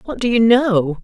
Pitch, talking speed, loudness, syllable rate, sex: 220 Hz, 230 wpm, -15 LUFS, 4.5 syllables/s, female